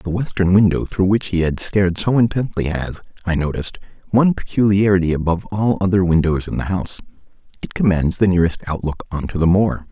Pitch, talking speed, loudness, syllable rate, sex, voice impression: 95 Hz, 180 wpm, -18 LUFS, 6.1 syllables/s, male, very masculine, slightly old, very thick, very relaxed, very weak, slightly bright, very soft, very muffled, slightly halting, raspy, cool, very intellectual, slightly refreshing, very sincere, very calm, very mature, friendly, reassuring, very unique, slightly elegant, wild, lively, very kind, slightly modest